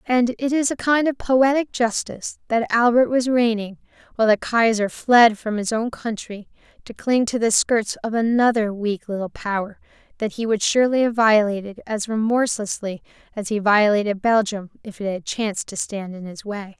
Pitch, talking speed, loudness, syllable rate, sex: 220 Hz, 180 wpm, -20 LUFS, 5.0 syllables/s, female